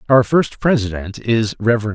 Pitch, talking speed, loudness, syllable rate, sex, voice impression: 115 Hz, 155 wpm, -17 LUFS, 4.1 syllables/s, male, masculine, adult-like, thick, tensed, powerful, clear, slightly raspy, cool, intellectual, calm, mature, friendly, reassuring, wild, lively, slightly kind